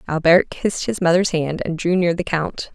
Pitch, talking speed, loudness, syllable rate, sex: 170 Hz, 220 wpm, -19 LUFS, 5.0 syllables/s, female